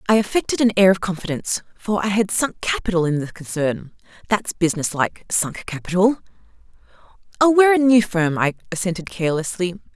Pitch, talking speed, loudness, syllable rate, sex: 190 Hz, 150 wpm, -20 LUFS, 5.1 syllables/s, female